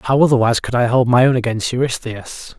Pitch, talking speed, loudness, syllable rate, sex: 120 Hz, 210 wpm, -16 LUFS, 5.9 syllables/s, male